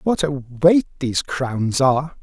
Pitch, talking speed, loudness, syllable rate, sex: 145 Hz, 160 wpm, -19 LUFS, 4.1 syllables/s, male